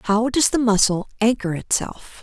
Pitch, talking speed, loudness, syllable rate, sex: 225 Hz, 160 wpm, -19 LUFS, 4.6 syllables/s, female